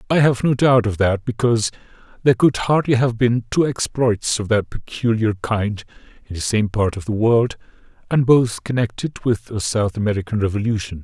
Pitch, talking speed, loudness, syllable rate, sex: 110 Hz, 180 wpm, -19 LUFS, 5.2 syllables/s, male